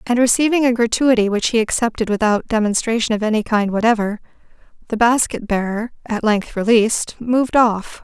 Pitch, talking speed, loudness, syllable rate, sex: 225 Hz, 155 wpm, -17 LUFS, 5.5 syllables/s, female